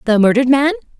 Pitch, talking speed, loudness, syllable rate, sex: 260 Hz, 180 wpm, -14 LUFS, 8.1 syllables/s, female